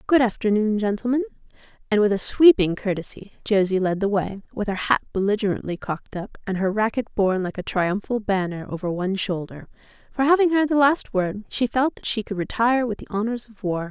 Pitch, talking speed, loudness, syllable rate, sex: 210 Hz, 200 wpm, -22 LUFS, 5.8 syllables/s, female